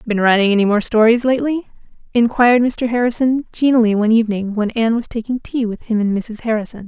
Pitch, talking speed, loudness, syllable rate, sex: 230 Hz, 190 wpm, -16 LUFS, 6.4 syllables/s, female